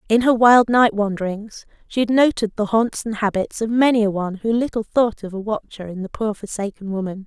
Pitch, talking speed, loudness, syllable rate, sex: 215 Hz, 225 wpm, -19 LUFS, 5.5 syllables/s, female